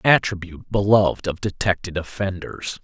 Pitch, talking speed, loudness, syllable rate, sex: 95 Hz, 125 wpm, -22 LUFS, 5.5 syllables/s, male